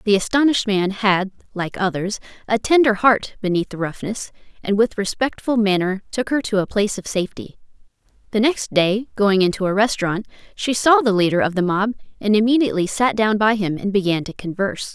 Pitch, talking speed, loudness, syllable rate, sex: 205 Hz, 190 wpm, -19 LUFS, 5.6 syllables/s, female